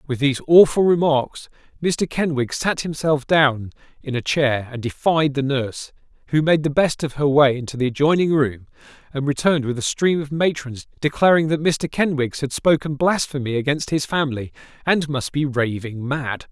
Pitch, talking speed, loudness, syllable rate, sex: 145 Hz, 180 wpm, -20 LUFS, 5.0 syllables/s, male